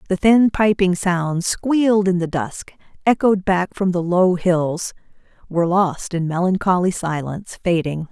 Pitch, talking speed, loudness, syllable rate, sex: 180 Hz, 150 wpm, -19 LUFS, 4.3 syllables/s, female